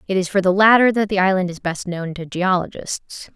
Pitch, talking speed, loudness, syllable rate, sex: 190 Hz, 230 wpm, -18 LUFS, 5.4 syllables/s, female